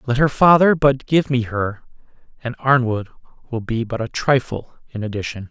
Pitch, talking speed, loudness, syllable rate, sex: 125 Hz, 175 wpm, -18 LUFS, 4.9 syllables/s, male